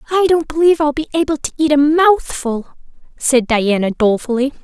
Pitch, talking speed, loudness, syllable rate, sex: 285 Hz, 170 wpm, -15 LUFS, 5.6 syllables/s, female